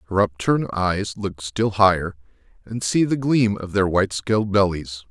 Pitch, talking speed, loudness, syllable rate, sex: 100 Hz, 175 wpm, -21 LUFS, 4.9 syllables/s, male